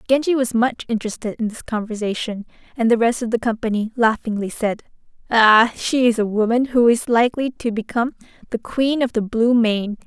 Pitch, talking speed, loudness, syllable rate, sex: 230 Hz, 185 wpm, -19 LUFS, 5.5 syllables/s, female